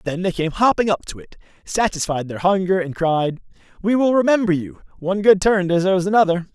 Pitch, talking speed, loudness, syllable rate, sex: 185 Hz, 185 wpm, -19 LUFS, 5.9 syllables/s, male